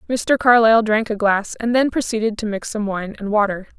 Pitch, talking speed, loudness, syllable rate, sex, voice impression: 220 Hz, 220 wpm, -18 LUFS, 5.5 syllables/s, female, feminine, adult-like, slightly intellectual, slightly sharp